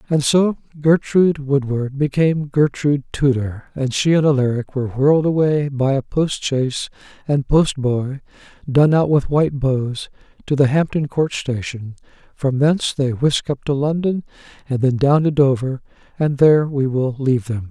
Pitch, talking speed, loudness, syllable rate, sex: 140 Hz, 165 wpm, -18 LUFS, 4.9 syllables/s, male